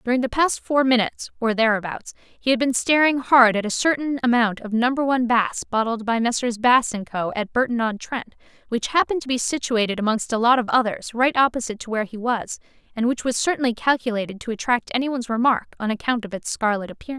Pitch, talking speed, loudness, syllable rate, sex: 240 Hz, 215 wpm, -21 LUFS, 6.0 syllables/s, female